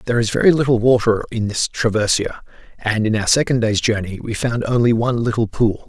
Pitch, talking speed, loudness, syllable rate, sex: 115 Hz, 205 wpm, -18 LUFS, 6.0 syllables/s, male